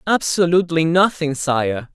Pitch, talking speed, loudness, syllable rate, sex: 160 Hz, 95 wpm, -18 LUFS, 4.4 syllables/s, male